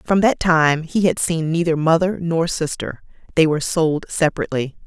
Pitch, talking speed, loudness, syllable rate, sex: 165 Hz, 160 wpm, -19 LUFS, 5.1 syllables/s, female